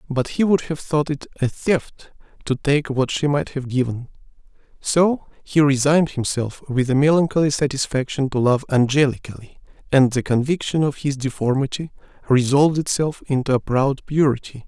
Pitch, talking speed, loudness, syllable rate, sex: 140 Hz, 155 wpm, -20 LUFS, 5.1 syllables/s, male